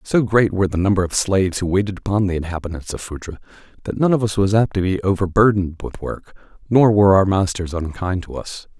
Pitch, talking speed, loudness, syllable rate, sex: 95 Hz, 220 wpm, -19 LUFS, 6.2 syllables/s, male